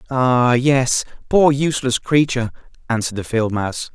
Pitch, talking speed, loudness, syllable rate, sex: 125 Hz, 135 wpm, -18 LUFS, 5.1 syllables/s, male